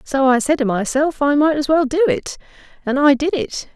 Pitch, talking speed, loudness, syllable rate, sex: 280 Hz, 225 wpm, -17 LUFS, 5.2 syllables/s, female